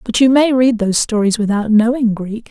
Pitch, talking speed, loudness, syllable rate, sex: 225 Hz, 215 wpm, -14 LUFS, 5.4 syllables/s, female